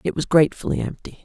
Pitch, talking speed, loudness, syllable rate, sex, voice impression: 145 Hz, 195 wpm, -21 LUFS, 7.1 syllables/s, male, very masculine, very adult-like, middle-aged, very thick, tensed, slightly powerful, slightly bright, very hard, very muffled, slightly fluent, very raspy, cool, very intellectual, sincere, slightly calm, very mature, friendly, reassuring, very unique, very wild, slightly sweet, lively, intense